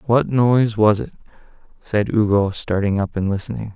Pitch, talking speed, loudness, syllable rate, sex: 105 Hz, 160 wpm, -19 LUFS, 5.1 syllables/s, male